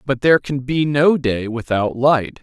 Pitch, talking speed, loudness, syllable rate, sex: 135 Hz, 200 wpm, -17 LUFS, 4.3 syllables/s, male